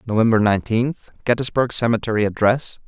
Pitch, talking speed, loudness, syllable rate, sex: 115 Hz, 105 wpm, -19 LUFS, 5.9 syllables/s, male